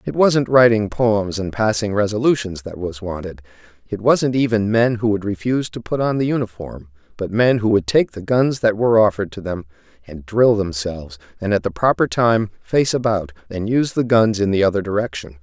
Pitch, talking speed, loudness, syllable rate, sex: 105 Hz, 200 wpm, -18 LUFS, 5.4 syllables/s, male